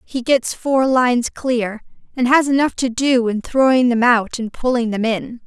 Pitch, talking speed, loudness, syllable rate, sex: 245 Hz, 200 wpm, -17 LUFS, 4.4 syllables/s, female